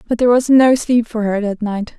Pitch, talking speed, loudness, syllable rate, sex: 230 Hz, 275 wpm, -15 LUFS, 5.5 syllables/s, female